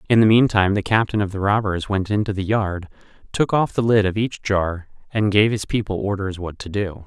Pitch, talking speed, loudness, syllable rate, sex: 100 Hz, 230 wpm, -20 LUFS, 5.4 syllables/s, male